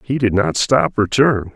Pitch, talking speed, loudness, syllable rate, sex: 110 Hz, 230 wpm, -16 LUFS, 4.1 syllables/s, male